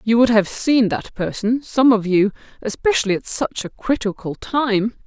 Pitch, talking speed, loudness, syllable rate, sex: 225 Hz, 180 wpm, -19 LUFS, 4.6 syllables/s, female